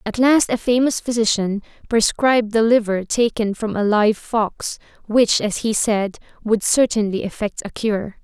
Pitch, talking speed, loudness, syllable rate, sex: 220 Hz, 160 wpm, -19 LUFS, 4.4 syllables/s, female